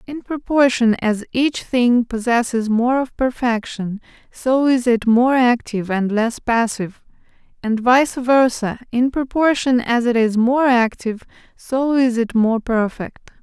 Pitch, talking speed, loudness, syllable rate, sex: 240 Hz, 145 wpm, -18 LUFS, 4.1 syllables/s, female